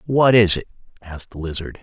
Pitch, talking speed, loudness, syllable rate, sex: 100 Hz, 195 wpm, -18 LUFS, 6.1 syllables/s, male